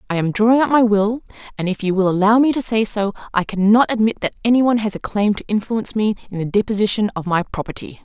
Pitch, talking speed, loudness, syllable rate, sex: 210 Hz, 240 wpm, -18 LUFS, 6.4 syllables/s, female